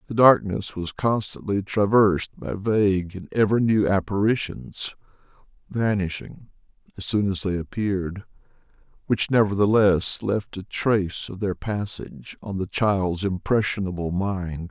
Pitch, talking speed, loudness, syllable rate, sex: 100 Hz, 120 wpm, -23 LUFS, 4.4 syllables/s, male